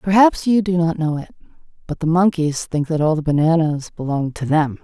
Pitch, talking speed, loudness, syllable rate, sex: 160 Hz, 210 wpm, -18 LUFS, 5.3 syllables/s, female